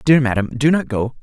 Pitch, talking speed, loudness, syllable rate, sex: 130 Hz, 245 wpm, -17 LUFS, 5.7 syllables/s, male